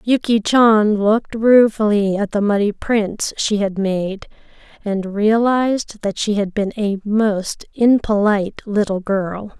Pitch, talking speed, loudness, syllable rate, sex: 210 Hz, 140 wpm, -17 LUFS, 3.8 syllables/s, female